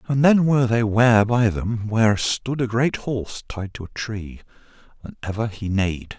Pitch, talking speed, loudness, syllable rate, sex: 110 Hz, 195 wpm, -21 LUFS, 4.7 syllables/s, male